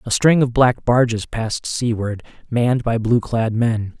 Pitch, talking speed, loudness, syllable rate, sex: 115 Hz, 180 wpm, -18 LUFS, 4.4 syllables/s, male